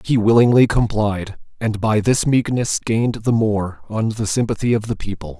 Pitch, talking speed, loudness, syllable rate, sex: 110 Hz, 180 wpm, -18 LUFS, 4.9 syllables/s, male